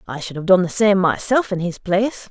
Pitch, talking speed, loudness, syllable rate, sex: 190 Hz, 260 wpm, -18 LUFS, 6.0 syllables/s, female